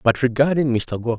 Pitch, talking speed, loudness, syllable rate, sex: 125 Hz, 205 wpm, -20 LUFS, 5.5 syllables/s, male